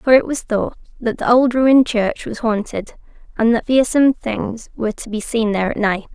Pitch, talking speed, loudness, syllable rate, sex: 230 Hz, 215 wpm, -18 LUFS, 5.2 syllables/s, female